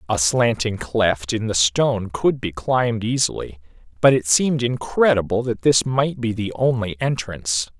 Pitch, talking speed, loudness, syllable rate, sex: 110 Hz, 160 wpm, -20 LUFS, 4.7 syllables/s, male